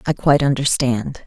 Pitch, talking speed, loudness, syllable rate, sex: 135 Hz, 140 wpm, -17 LUFS, 5.2 syllables/s, female